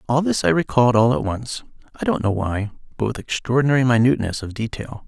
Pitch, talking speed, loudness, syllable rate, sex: 115 Hz, 200 wpm, -20 LUFS, 6.3 syllables/s, male